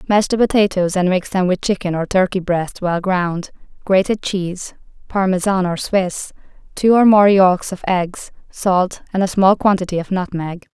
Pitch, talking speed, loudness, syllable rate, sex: 185 Hz, 175 wpm, -17 LUFS, 4.4 syllables/s, female